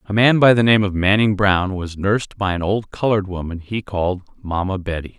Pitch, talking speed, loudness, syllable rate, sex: 100 Hz, 220 wpm, -18 LUFS, 5.5 syllables/s, male